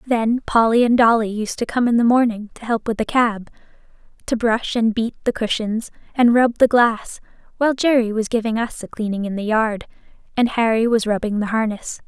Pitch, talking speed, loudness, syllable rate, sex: 225 Hz, 200 wpm, -19 LUFS, 5.2 syllables/s, female